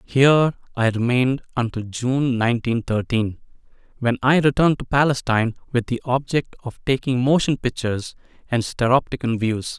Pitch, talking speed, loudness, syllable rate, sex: 125 Hz, 135 wpm, -21 LUFS, 5.2 syllables/s, male